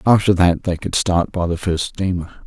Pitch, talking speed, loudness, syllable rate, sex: 90 Hz, 220 wpm, -18 LUFS, 5.1 syllables/s, male